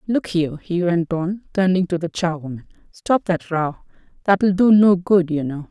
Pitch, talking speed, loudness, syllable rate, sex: 175 Hz, 180 wpm, -19 LUFS, 4.6 syllables/s, female